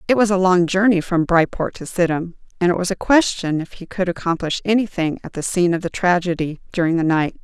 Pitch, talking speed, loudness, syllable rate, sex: 180 Hz, 225 wpm, -19 LUFS, 5.9 syllables/s, female